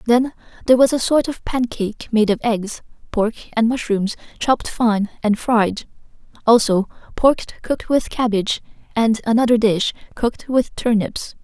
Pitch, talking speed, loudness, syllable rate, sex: 230 Hz, 145 wpm, -19 LUFS, 4.8 syllables/s, female